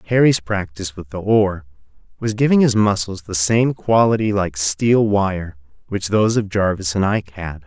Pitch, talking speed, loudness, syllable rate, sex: 100 Hz, 170 wpm, -18 LUFS, 4.9 syllables/s, male